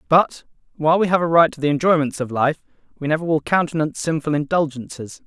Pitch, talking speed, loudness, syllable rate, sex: 155 Hz, 195 wpm, -19 LUFS, 6.4 syllables/s, male